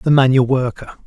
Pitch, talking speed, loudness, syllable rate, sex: 130 Hz, 170 wpm, -15 LUFS, 5.6 syllables/s, male